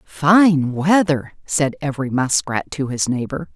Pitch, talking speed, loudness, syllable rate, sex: 145 Hz, 135 wpm, -18 LUFS, 4.0 syllables/s, female